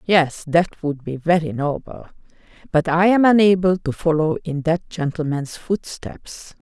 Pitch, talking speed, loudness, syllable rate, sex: 165 Hz, 145 wpm, -19 LUFS, 4.2 syllables/s, female